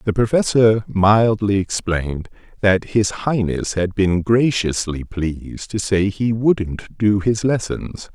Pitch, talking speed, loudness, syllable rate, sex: 105 Hz, 135 wpm, -18 LUFS, 3.7 syllables/s, male